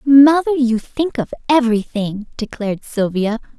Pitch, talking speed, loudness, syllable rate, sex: 245 Hz, 115 wpm, -17 LUFS, 4.8 syllables/s, female